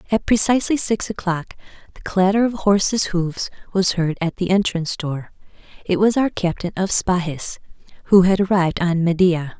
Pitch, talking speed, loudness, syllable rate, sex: 185 Hz, 165 wpm, -19 LUFS, 5.2 syllables/s, female